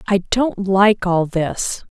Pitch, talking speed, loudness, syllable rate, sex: 195 Hz, 155 wpm, -17 LUFS, 2.9 syllables/s, female